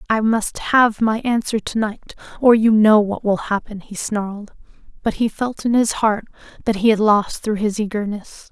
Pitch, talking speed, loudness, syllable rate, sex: 215 Hz, 195 wpm, -18 LUFS, 4.7 syllables/s, female